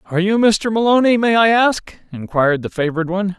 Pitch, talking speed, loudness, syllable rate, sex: 195 Hz, 195 wpm, -16 LUFS, 6.0 syllables/s, male